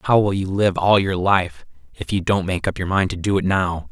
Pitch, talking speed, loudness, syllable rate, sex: 95 Hz, 275 wpm, -19 LUFS, 5.0 syllables/s, male